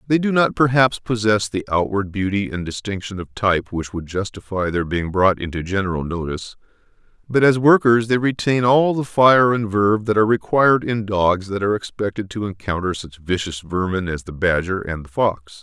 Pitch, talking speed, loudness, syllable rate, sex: 100 Hz, 190 wpm, -19 LUFS, 5.3 syllables/s, male